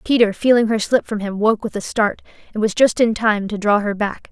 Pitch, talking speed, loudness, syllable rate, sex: 215 Hz, 265 wpm, -18 LUFS, 5.4 syllables/s, female